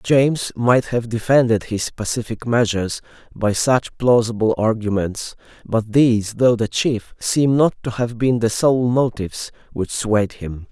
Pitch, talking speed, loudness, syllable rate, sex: 115 Hz, 150 wpm, -19 LUFS, 4.3 syllables/s, male